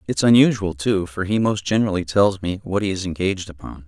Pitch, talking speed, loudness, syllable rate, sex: 95 Hz, 215 wpm, -20 LUFS, 6.0 syllables/s, male